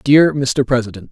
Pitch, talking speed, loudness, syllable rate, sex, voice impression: 130 Hz, 160 wpm, -15 LUFS, 4.7 syllables/s, male, masculine, adult-like, powerful, fluent, slightly halting, cool, sincere, slightly mature, wild, slightly strict, slightly sharp